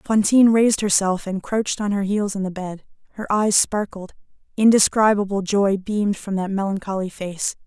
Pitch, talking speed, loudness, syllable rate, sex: 200 Hz, 165 wpm, -20 LUFS, 5.2 syllables/s, female